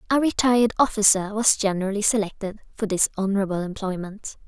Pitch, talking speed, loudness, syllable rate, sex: 205 Hz, 135 wpm, -22 LUFS, 6.1 syllables/s, female